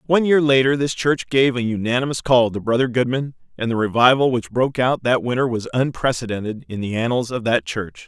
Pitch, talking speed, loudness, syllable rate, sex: 125 Hz, 210 wpm, -19 LUFS, 5.8 syllables/s, male